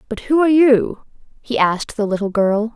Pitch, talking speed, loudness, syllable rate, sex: 230 Hz, 195 wpm, -17 LUFS, 5.4 syllables/s, female